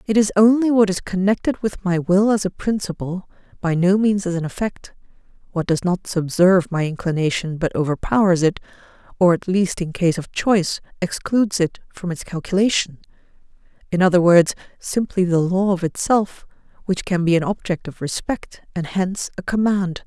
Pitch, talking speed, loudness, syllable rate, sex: 185 Hz, 175 wpm, -20 LUFS, 5.2 syllables/s, female